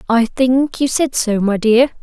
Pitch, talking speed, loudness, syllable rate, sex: 240 Hz, 205 wpm, -15 LUFS, 4.0 syllables/s, female